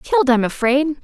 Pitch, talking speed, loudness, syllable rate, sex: 275 Hz, 175 wpm, -17 LUFS, 5.3 syllables/s, female